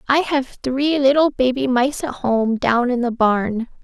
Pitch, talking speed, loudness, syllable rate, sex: 260 Hz, 190 wpm, -18 LUFS, 3.9 syllables/s, female